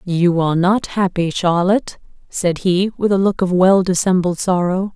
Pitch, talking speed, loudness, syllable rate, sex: 185 Hz, 170 wpm, -16 LUFS, 4.7 syllables/s, female